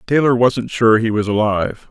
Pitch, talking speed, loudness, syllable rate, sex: 115 Hz, 190 wpm, -16 LUFS, 5.1 syllables/s, male